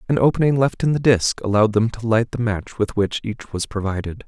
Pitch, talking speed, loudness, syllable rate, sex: 115 Hz, 240 wpm, -20 LUFS, 5.7 syllables/s, male